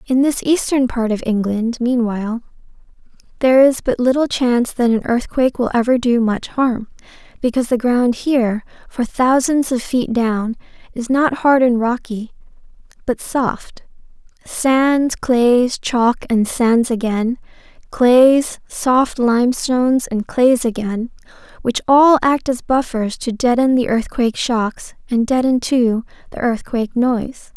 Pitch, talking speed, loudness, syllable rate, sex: 245 Hz, 135 wpm, -16 LUFS, 4.1 syllables/s, female